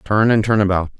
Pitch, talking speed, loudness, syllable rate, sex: 105 Hz, 240 wpm, -16 LUFS, 5.6 syllables/s, male